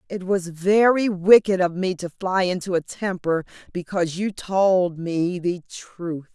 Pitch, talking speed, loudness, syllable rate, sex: 185 Hz, 160 wpm, -22 LUFS, 4.0 syllables/s, female